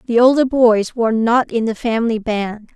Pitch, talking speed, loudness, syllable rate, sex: 230 Hz, 195 wpm, -16 LUFS, 5.1 syllables/s, female